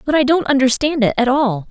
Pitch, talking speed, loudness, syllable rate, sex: 265 Hz, 245 wpm, -15 LUFS, 5.7 syllables/s, female